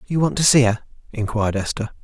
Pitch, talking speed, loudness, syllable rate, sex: 120 Hz, 205 wpm, -19 LUFS, 6.4 syllables/s, male